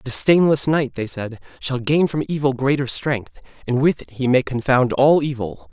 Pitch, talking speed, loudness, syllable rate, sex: 135 Hz, 200 wpm, -19 LUFS, 4.8 syllables/s, male